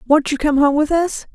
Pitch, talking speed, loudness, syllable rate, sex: 295 Hz, 265 wpm, -17 LUFS, 5.2 syllables/s, female